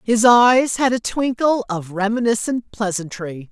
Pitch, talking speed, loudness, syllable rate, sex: 220 Hz, 135 wpm, -18 LUFS, 4.2 syllables/s, female